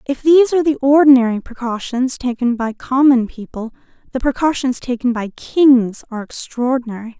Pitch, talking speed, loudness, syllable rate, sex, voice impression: 255 Hz, 140 wpm, -16 LUFS, 5.3 syllables/s, female, feminine, adult-like, slightly soft, slightly calm, friendly, reassuring, slightly sweet